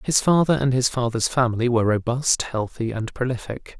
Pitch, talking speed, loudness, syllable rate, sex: 125 Hz, 175 wpm, -21 LUFS, 5.4 syllables/s, male